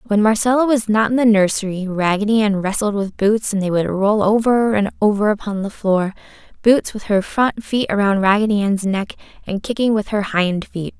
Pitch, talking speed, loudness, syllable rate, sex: 210 Hz, 200 wpm, -17 LUFS, 5.2 syllables/s, female